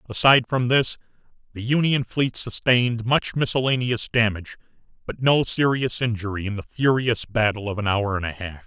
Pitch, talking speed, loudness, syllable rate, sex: 115 Hz, 165 wpm, -22 LUFS, 5.3 syllables/s, male